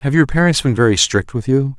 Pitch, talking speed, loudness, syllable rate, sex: 130 Hz, 270 wpm, -15 LUFS, 5.7 syllables/s, male